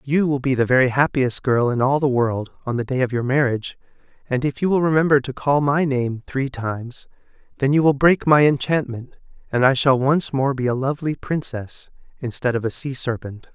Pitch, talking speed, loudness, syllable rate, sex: 135 Hz, 215 wpm, -20 LUFS, 5.3 syllables/s, male